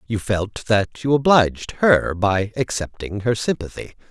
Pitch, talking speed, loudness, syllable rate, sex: 110 Hz, 145 wpm, -20 LUFS, 4.3 syllables/s, male